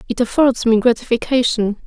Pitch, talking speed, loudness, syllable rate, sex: 235 Hz, 130 wpm, -16 LUFS, 5.4 syllables/s, female